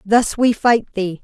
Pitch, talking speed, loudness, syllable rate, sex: 220 Hz, 195 wpm, -17 LUFS, 3.9 syllables/s, female